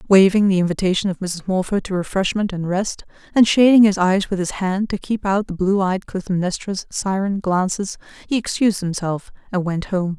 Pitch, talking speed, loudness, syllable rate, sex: 190 Hz, 190 wpm, -19 LUFS, 5.3 syllables/s, female